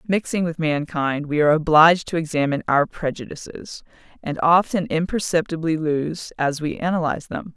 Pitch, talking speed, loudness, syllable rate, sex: 160 Hz, 145 wpm, -20 LUFS, 5.4 syllables/s, female